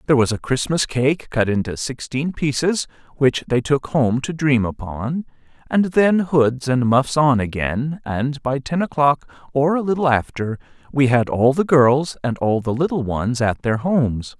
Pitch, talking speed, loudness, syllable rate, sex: 135 Hz, 185 wpm, -19 LUFS, 4.4 syllables/s, male